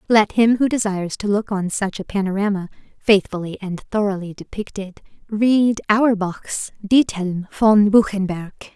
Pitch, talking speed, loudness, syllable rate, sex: 205 Hz, 130 wpm, -19 LUFS, 4.6 syllables/s, female